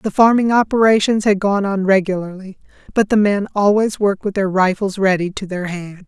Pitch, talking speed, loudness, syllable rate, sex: 200 Hz, 190 wpm, -16 LUFS, 5.3 syllables/s, female